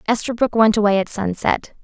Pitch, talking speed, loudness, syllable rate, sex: 215 Hz, 165 wpm, -18 LUFS, 5.2 syllables/s, female